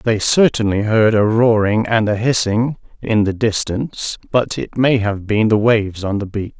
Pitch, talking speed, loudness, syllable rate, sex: 110 Hz, 190 wpm, -16 LUFS, 4.5 syllables/s, male